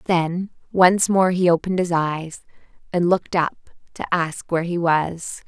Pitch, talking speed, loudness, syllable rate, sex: 175 Hz, 165 wpm, -20 LUFS, 4.5 syllables/s, female